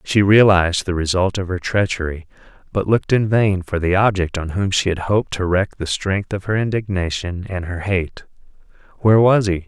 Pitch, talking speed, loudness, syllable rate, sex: 95 Hz, 200 wpm, -18 LUFS, 5.3 syllables/s, male